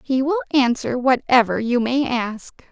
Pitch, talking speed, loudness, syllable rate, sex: 245 Hz, 155 wpm, -19 LUFS, 4.3 syllables/s, female